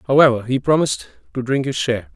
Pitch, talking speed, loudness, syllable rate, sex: 130 Hz, 195 wpm, -18 LUFS, 7.1 syllables/s, male